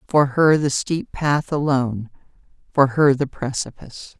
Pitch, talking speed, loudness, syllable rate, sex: 135 Hz, 145 wpm, -20 LUFS, 4.4 syllables/s, female